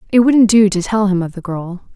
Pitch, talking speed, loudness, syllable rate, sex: 200 Hz, 275 wpm, -14 LUFS, 5.1 syllables/s, female